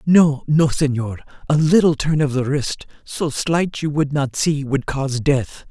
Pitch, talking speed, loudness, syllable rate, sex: 145 Hz, 190 wpm, -19 LUFS, 4.1 syllables/s, female